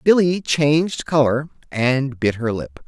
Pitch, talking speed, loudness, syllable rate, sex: 140 Hz, 145 wpm, -19 LUFS, 3.9 syllables/s, male